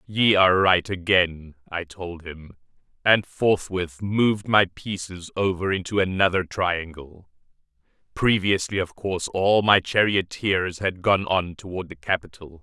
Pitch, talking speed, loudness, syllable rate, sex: 90 Hz, 135 wpm, -22 LUFS, 2.7 syllables/s, male